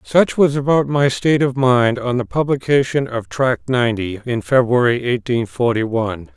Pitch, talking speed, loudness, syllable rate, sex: 125 Hz, 170 wpm, -17 LUFS, 4.8 syllables/s, male